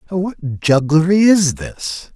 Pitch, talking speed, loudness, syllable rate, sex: 165 Hz, 110 wpm, -16 LUFS, 3.1 syllables/s, male